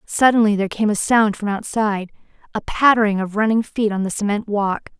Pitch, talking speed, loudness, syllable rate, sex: 210 Hz, 180 wpm, -18 LUFS, 5.7 syllables/s, female